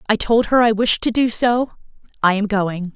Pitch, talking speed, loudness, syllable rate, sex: 220 Hz, 225 wpm, -17 LUFS, 4.9 syllables/s, female